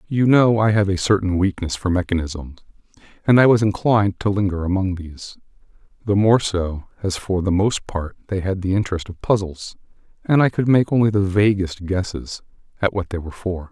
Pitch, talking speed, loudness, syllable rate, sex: 95 Hz, 195 wpm, -19 LUFS, 5.4 syllables/s, male